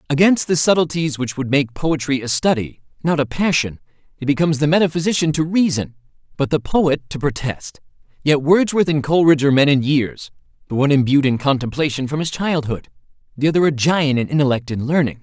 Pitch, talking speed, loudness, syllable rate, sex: 145 Hz, 185 wpm, -18 LUFS, 6.0 syllables/s, male